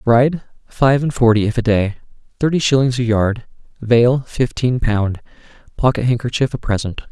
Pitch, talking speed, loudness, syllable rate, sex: 120 Hz, 150 wpm, -17 LUFS, 4.9 syllables/s, male